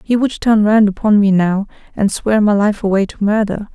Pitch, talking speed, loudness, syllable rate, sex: 210 Hz, 225 wpm, -14 LUFS, 5.1 syllables/s, female